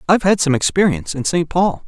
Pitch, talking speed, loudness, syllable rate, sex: 160 Hz, 225 wpm, -16 LUFS, 6.4 syllables/s, male